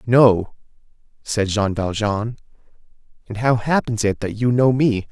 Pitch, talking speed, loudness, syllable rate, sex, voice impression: 115 Hz, 140 wpm, -19 LUFS, 4.1 syllables/s, male, masculine, very adult-like, middle-aged, thick, slightly tensed, slightly weak, slightly bright, slightly hard, slightly muffled, fluent, slightly raspy, very cool, intellectual, refreshing, very sincere, calm, mature, friendly, reassuring, slightly unique, wild, sweet, slightly lively, kind, slightly modest